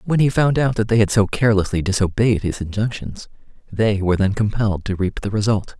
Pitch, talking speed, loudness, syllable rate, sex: 105 Hz, 215 wpm, -19 LUFS, 6.1 syllables/s, male